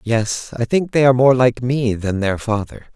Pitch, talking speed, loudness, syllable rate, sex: 120 Hz, 225 wpm, -17 LUFS, 4.6 syllables/s, male